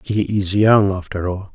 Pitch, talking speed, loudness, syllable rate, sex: 100 Hz, 195 wpm, -17 LUFS, 4.2 syllables/s, male